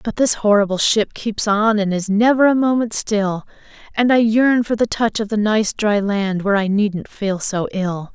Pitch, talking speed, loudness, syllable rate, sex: 210 Hz, 215 wpm, -17 LUFS, 4.5 syllables/s, female